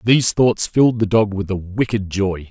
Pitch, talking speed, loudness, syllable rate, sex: 105 Hz, 215 wpm, -18 LUFS, 5.1 syllables/s, male